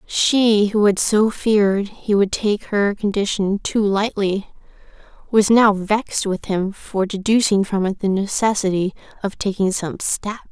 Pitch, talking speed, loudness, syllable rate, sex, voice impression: 205 Hz, 155 wpm, -19 LUFS, 4.2 syllables/s, female, feminine, slightly adult-like, slightly cute, friendly, slightly reassuring, slightly kind